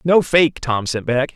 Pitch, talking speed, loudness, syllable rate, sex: 140 Hz, 220 wpm, -17 LUFS, 4.0 syllables/s, male